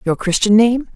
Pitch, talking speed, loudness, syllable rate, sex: 220 Hz, 190 wpm, -14 LUFS, 5.1 syllables/s, female